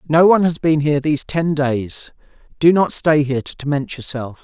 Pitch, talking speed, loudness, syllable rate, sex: 150 Hz, 205 wpm, -17 LUFS, 5.6 syllables/s, male